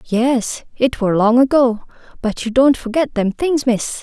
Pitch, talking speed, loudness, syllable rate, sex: 245 Hz, 180 wpm, -16 LUFS, 4.0 syllables/s, female